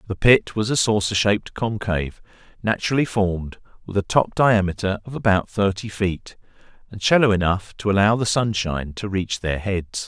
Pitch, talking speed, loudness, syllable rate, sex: 100 Hz, 165 wpm, -21 LUFS, 5.2 syllables/s, male